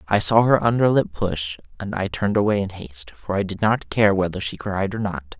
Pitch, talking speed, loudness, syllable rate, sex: 100 Hz, 245 wpm, -21 LUFS, 5.4 syllables/s, male